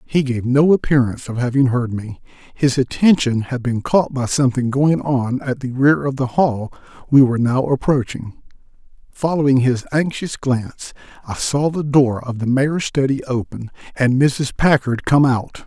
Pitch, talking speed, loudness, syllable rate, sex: 130 Hz, 170 wpm, -18 LUFS, 4.7 syllables/s, male